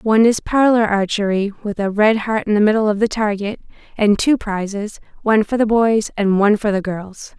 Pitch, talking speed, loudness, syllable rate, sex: 210 Hz, 210 wpm, -17 LUFS, 5.3 syllables/s, female